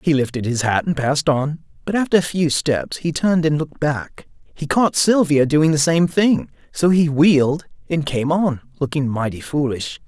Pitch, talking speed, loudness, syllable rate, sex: 150 Hz, 195 wpm, -18 LUFS, 4.8 syllables/s, male